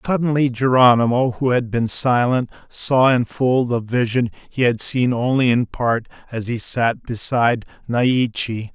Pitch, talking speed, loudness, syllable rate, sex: 120 Hz, 150 wpm, -18 LUFS, 4.4 syllables/s, male